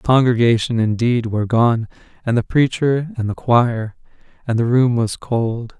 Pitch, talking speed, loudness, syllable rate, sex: 120 Hz, 165 wpm, -18 LUFS, 4.6 syllables/s, male